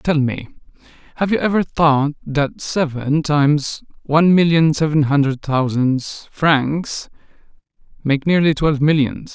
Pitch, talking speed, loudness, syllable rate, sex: 150 Hz, 120 wpm, -17 LUFS, 4.1 syllables/s, male